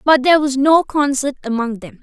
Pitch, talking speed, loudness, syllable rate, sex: 270 Hz, 210 wpm, -16 LUFS, 5.4 syllables/s, female